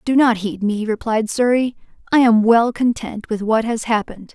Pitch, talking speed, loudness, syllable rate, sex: 225 Hz, 195 wpm, -18 LUFS, 4.9 syllables/s, female